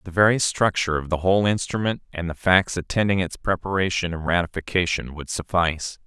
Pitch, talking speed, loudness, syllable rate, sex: 90 Hz, 170 wpm, -22 LUFS, 5.9 syllables/s, male